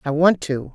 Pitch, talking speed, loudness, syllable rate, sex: 150 Hz, 240 wpm, -19 LUFS, 4.6 syllables/s, female